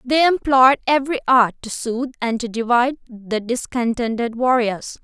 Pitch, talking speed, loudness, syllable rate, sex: 245 Hz, 145 wpm, -19 LUFS, 4.9 syllables/s, female